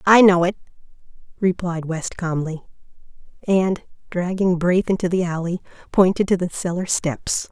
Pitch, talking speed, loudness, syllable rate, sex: 180 Hz, 135 wpm, -20 LUFS, 4.7 syllables/s, female